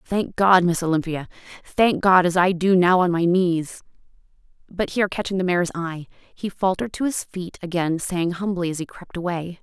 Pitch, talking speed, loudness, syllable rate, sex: 180 Hz, 195 wpm, -21 LUFS, 5.0 syllables/s, female